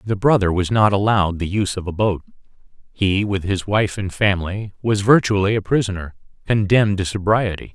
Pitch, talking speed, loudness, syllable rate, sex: 100 Hz, 180 wpm, -19 LUFS, 5.7 syllables/s, male